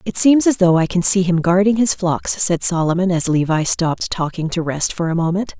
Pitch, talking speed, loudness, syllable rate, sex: 180 Hz, 235 wpm, -16 LUFS, 5.3 syllables/s, female